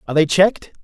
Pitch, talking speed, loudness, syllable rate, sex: 165 Hz, 215 wpm, -16 LUFS, 8.8 syllables/s, male